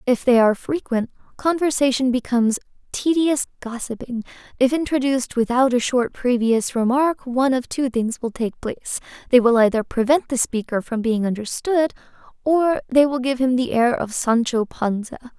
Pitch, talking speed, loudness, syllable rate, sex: 250 Hz, 165 wpm, -20 LUFS, 5.2 syllables/s, female